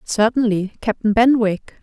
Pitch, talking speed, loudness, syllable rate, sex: 220 Hz, 100 wpm, -18 LUFS, 4.2 syllables/s, female